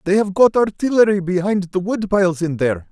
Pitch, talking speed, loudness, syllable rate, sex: 190 Hz, 205 wpm, -17 LUFS, 5.8 syllables/s, male